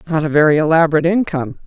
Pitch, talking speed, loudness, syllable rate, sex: 160 Hz, 180 wpm, -15 LUFS, 8.6 syllables/s, female